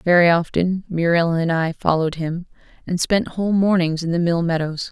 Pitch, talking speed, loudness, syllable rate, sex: 170 Hz, 185 wpm, -19 LUFS, 5.2 syllables/s, female